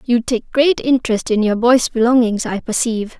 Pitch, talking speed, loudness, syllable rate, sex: 235 Hz, 190 wpm, -16 LUFS, 5.5 syllables/s, female